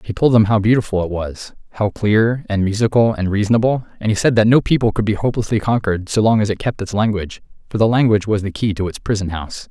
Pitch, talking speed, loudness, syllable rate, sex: 105 Hz, 245 wpm, -17 LUFS, 6.6 syllables/s, male